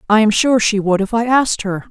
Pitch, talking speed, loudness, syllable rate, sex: 215 Hz, 285 wpm, -15 LUFS, 5.9 syllables/s, female